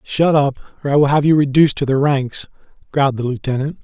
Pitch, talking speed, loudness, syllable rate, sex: 140 Hz, 220 wpm, -16 LUFS, 6.4 syllables/s, male